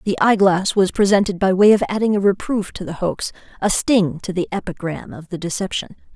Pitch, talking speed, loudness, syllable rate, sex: 190 Hz, 195 wpm, -18 LUFS, 5.4 syllables/s, female